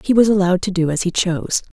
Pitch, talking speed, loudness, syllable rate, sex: 185 Hz, 275 wpm, -17 LUFS, 7.1 syllables/s, female